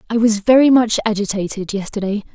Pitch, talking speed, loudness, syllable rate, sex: 215 Hz, 155 wpm, -16 LUFS, 6.0 syllables/s, female